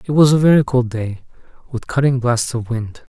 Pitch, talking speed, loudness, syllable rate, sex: 125 Hz, 210 wpm, -17 LUFS, 5.2 syllables/s, male